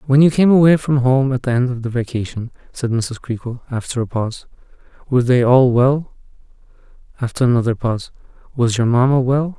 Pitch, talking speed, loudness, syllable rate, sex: 125 Hz, 180 wpm, -17 LUFS, 5.8 syllables/s, male